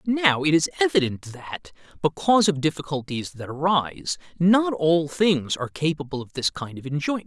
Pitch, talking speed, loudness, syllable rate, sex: 160 Hz, 165 wpm, -23 LUFS, 5.2 syllables/s, male